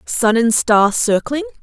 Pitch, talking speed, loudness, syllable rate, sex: 250 Hz, 150 wpm, -15 LUFS, 3.8 syllables/s, female